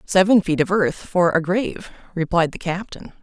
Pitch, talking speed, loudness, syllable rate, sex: 180 Hz, 185 wpm, -20 LUFS, 5.0 syllables/s, female